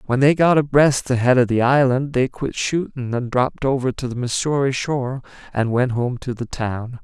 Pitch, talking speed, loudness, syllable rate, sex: 130 Hz, 215 wpm, -19 LUFS, 5.0 syllables/s, male